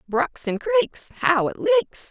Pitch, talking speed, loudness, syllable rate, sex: 320 Hz, 170 wpm, -22 LUFS, 3.8 syllables/s, female